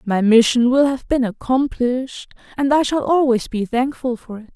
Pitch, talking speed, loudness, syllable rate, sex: 250 Hz, 185 wpm, -18 LUFS, 4.8 syllables/s, female